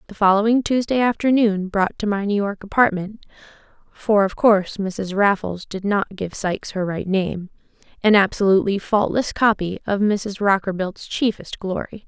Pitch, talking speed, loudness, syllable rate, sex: 205 Hz, 145 wpm, -20 LUFS, 4.8 syllables/s, female